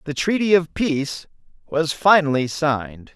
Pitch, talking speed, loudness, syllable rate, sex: 155 Hz, 135 wpm, -20 LUFS, 4.6 syllables/s, male